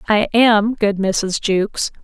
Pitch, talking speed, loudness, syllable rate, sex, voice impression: 210 Hz, 145 wpm, -16 LUFS, 3.6 syllables/s, female, slightly feminine, very gender-neutral, very adult-like, middle-aged, slightly thin, tensed, slightly powerful, slightly bright, hard, clear, very fluent, slightly cool, very intellectual, very sincere, very calm, slightly friendly, reassuring, lively, strict